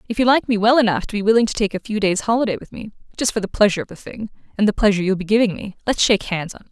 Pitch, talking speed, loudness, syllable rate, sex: 210 Hz, 320 wpm, -19 LUFS, 7.8 syllables/s, female